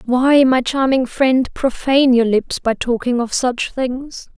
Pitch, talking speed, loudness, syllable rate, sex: 255 Hz, 165 wpm, -16 LUFS, 3.9 syllables/s, female